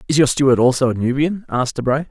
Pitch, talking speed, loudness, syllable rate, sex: 135 Hz, 230 wpm, -17 LUFS, 6.8 syllables/s, male